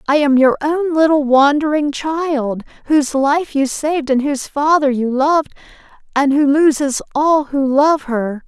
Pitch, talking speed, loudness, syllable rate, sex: 285 Hz, 165 wpm, -15 LUFS, 4.4 syllables/s, female